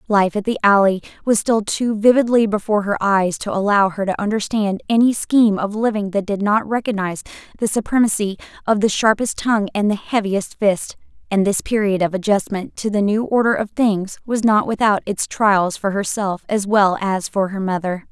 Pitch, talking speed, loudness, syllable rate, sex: 205 Hz, 190 wpm, -18 LUFS, 5.2 syllables/s, female